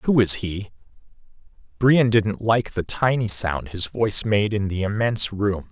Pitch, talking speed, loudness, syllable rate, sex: 105 Hz, 170 wpm, -21 LUFS, 4.4 syllables/s, male